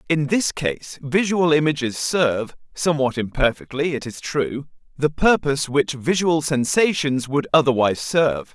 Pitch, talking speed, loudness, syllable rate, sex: 145 Hz, 135 wpm, -20 LUFS, 4.7 syllables/s, male